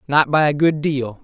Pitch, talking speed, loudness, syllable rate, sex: 145 Hz, 245 wpm, -17 LUFS, 4.7 syllables/s, male